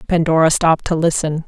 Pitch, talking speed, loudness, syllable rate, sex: 160 Hz, 160 wpm, -16 LUFS, 6.2 syllables/s, female